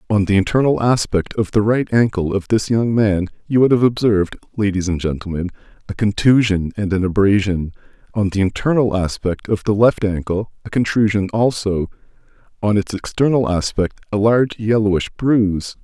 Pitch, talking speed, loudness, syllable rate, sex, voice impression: 105 Hz, 165 wpm, -17 LUFS, 5.3 syllables/s, male, masculine, adult-like, thick, tensed, powerful, slightly soft, slightly muffled, sincere, calm, friendly, reassuring, slightly wild, kind, slightly modest